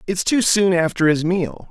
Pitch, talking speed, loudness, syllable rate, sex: 180 Hz, 210 wpm, -18 LUFS, 4.6 syllables/s, male